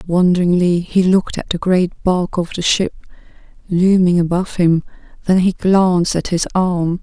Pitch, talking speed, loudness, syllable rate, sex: 180 Hz, 160 wpm, -16 LUFS, 4.9 syllables/s, female